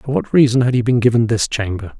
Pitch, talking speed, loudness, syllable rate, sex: 120 Hz, 270 wpm, -16 LUFS, 6.2 syllables/s, male